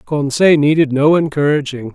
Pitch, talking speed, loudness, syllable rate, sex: 145 Hz, 125 wpm, -13 LUFS, 5.0 syllables/s, male